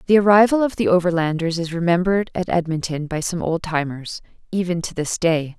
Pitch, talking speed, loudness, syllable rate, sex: 175 Hz, 185 wpm, -20 LUFS, 5.7 syllables/s, female